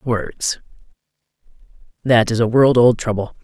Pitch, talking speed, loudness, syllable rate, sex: 115 Hz, 120 wpm, -16 LUFS, 4.1 syllables/s, male